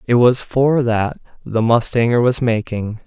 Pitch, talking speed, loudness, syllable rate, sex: 120 Hz, 155 wpm, -17 LUFS, 4.1 syllables/s, male